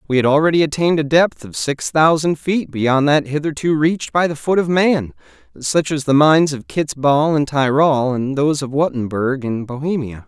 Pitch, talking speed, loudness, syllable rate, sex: 145 Hz, 200 wpm, -17 LUFS, 5.1 syllables/s, male